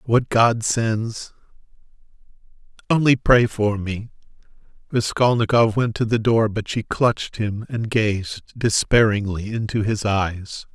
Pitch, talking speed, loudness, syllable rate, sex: 110 Hz, 125 wpm, -20 LUFS, 3.9 syllables/s, male